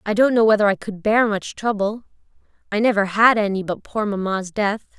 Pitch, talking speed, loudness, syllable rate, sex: 210 Hz, 205 wpm, -19 LUFS, 5.4 syllables/s, female